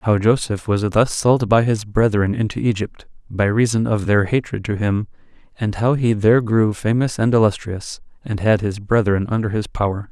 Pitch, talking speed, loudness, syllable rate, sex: 110 Hz, 190 wpm, -19 LUFS, 4.9 syllables/s, male